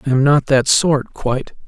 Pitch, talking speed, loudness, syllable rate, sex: 135 Hz, 180 wpm, -16 LUFS, 4.8 syllables/s, male